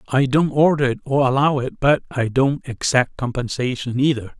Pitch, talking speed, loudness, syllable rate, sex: 130 Hz, 175 wpm, -19 LUFS, 5.0 syllables/s, male